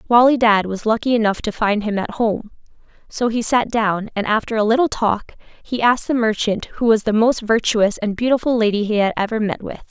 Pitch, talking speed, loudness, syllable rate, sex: 220 Hz, 220 wpm, -18 LUFS, 5.5 syllables/s, female